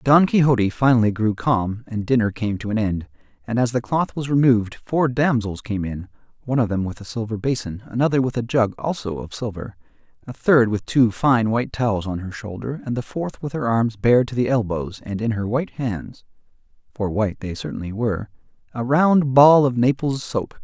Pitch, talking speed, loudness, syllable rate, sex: 115 Hz, 205 wpm, -21 LUFS, 5.1 syllables/s, male